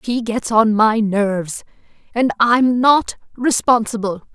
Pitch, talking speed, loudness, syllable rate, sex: 225 Hz, 125 wpm, -16 LUFS, 3.8 syllables/s, female